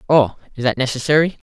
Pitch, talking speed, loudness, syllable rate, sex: 135 Hz, 165 wpm, -18 LUFS, 6.7 syllables/s, male